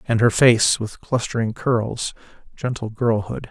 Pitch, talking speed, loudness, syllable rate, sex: 115 Hz, 135 wpm, -20 LUFS, 4.1 syllables/s, male